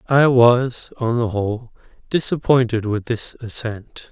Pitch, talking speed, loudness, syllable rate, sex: 120 Hz, 130 wpm, -19 LUFS, 3.9 syllables/s, male